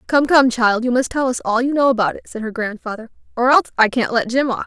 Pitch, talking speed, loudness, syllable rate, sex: 245 Hz, 285 wpm, -17 LUFS, 6.3 syllables/s, female